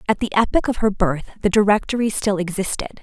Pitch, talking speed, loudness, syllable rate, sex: 205 Hz, 200 wpm, -20 LUFS, 6.4 syllables/s, female